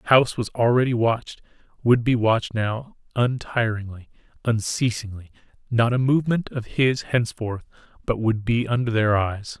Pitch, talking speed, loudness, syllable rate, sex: 115 Hz, 145 wpm, -22 LUFS, 5.1 syllables/s, male